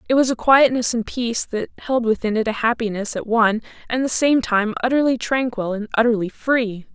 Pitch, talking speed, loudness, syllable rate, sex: 235 Hz, 200 wpm, -20 LUFS, 5.5 syllables/s, female